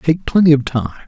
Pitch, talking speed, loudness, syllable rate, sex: 145 Hz, 225 wpm, -15 LUFS, 5.8 syllables/s, male